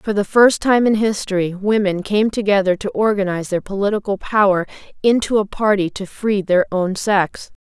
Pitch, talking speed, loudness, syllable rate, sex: 200 Hz, 175 wpm, -17 LUFS, 5.1 syllables/s, female